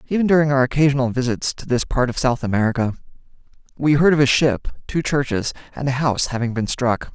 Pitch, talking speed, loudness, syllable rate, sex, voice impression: 130 Hz, 200 wpm, -19 LUFS, 6.2 syllables/s, male, very masculine, slightly young, slightly adult-like, very thick, very tensed, very powerful, slightly bright, slightly soft, slightly clear, very cool, very intellectual, refreshing, very sincere, very calm, slightly mature, friendly, very reassuring, unique, elegant, slightly wild, sweet, kind, modest